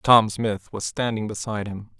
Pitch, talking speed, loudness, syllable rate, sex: 105 Hz, 180 wpm, -24 LUFS, 4.7 syllables/s, male